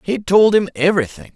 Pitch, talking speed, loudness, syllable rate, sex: 175 Hz, 180 wpm, -15 LUFS, 5.9 syllables/s, male